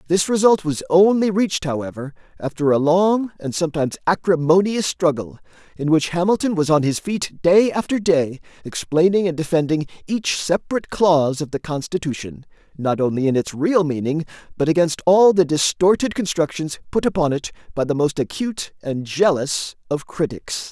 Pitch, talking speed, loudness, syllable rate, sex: 165 Hz, 155 wpm, -19 LUFS, 5.2 syllables/s, male